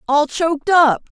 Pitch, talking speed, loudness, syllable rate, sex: 305 Hz, 150 wpm, -16 LUFS, 4.6 syllables/s, female